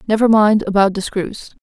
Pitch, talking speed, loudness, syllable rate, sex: 205 Hz, 185 wpm, -15 LUFS, 5.2 syllables/s, female